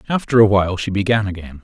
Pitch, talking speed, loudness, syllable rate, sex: 105 Hz, 220 wpm, -17 LUFS, 6.9 syllables/s, male